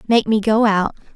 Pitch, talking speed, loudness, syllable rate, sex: 215 Hz, 210 wpm, -17 LUFS, 4.9 syllables/s, female